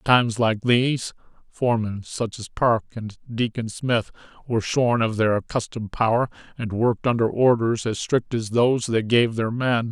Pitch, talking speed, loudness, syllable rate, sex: 115 Hz, 175 wpm, -22 LUFS, 5.0 syllables/s, male